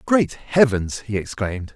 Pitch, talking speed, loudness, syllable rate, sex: 120 Hz, 135 wpm, -21 LUFS, 4.3 syllables/s, male